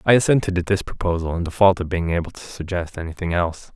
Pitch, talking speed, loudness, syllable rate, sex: 90 Hz, 225 wpm, -21 LUFS, 6.6 syllables/s, male